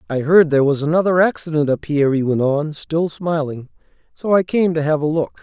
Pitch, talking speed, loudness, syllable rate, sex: 155 Hz, 220 wpm, -17 LUFS, 5.7 syllables/s, male